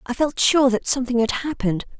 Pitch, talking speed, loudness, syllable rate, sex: 250 Hz, 210 wpm, -20 LUFS, 6.2 syllables/s, female